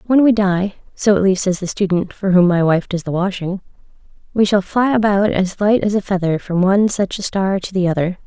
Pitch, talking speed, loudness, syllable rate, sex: 190 Hz, 225 wpm, -17 LUFS, 5.5 syllables/s, female